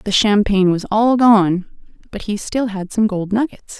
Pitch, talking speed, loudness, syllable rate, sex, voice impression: 210 Hz, 190 wpm, -16 LUFS, 4.5 syllables/s, female, very feminine, adult-like, slightly middle-aged, thin, slightly tensed, slightly weak, slightly bright, soft, clear, fluent, slightly cute, intellectual, very refreshing, sincere, calm, very friendly, reassuring, unique, elegant, slightly wild, sweet, slightly lively, kind, slightly sharp, slightly modest